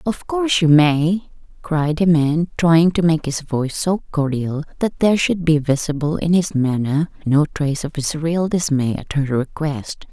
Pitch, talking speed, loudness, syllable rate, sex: 160 Hz, 185 wpm, -18 LUFS, 4.5 syllables/s, female